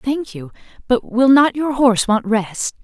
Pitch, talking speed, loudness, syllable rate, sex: 240 Hz, 190 wpm, -16 LUFS, 4.3 syllables/s, female